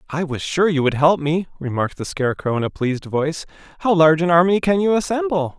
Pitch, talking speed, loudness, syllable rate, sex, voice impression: 165 Hz, 225 wpm, -19 LUFS, 6.3 syllables/s, male, masculine, adult-like, tensed, powerful, bright, clear, fluent, intellectual, friendly, lively, slightly strict, slightly sharp